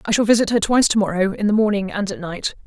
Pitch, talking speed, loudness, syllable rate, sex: 205 Hz, 295 wpm, -19 LUFS, 6.9 syllables/s, female